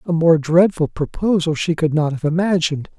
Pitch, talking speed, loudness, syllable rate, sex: 165 Hz, 180 wpm, -17 LUFS, 5.3 syllables/s, male